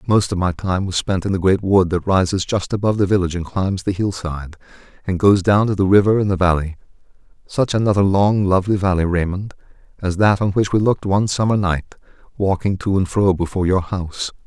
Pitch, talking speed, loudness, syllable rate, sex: 95 Hz, 210 wpm, -18 LUFS, 6.0 syllables/s, male